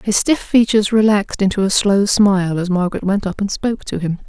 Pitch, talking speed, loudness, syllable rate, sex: 200 Hz, 225 wpm, -16 LUFS, 6.0 syllables/s, female